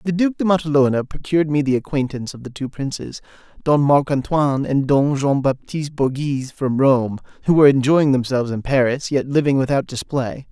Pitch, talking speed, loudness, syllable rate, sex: 140 Hz, 185 wpm, -19 LUFS, 5.7 syllables/s, male